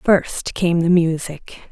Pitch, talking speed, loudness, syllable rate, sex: 170 Hz, 140 wpm, -18 LUFS, 3.1 syllables/s, female